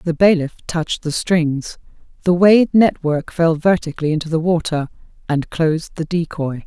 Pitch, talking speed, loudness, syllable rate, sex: 165 Hz, 160 wpm, -17 LUFS, 4.9 syllables/s, female